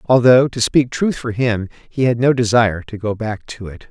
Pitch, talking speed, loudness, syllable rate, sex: 120 Hz, 230 wpm, -16 LUFS, 5.0 syllables/s, male